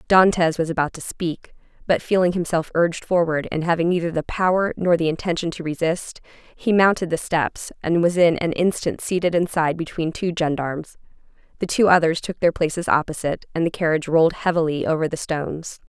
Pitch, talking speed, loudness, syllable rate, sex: 170 Hz, 185 wpm, -21 LUFS, 5.8 syllables/s, female